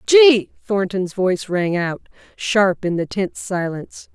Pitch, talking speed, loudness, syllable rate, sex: 190 Hz, 145 wpm, -19 LUFS, 4.2 syllables/s, female